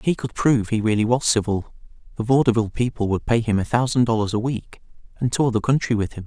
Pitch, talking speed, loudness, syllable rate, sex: 115 Hz, 240 wpm, -21 LUFS, 6.5 syllables/s, male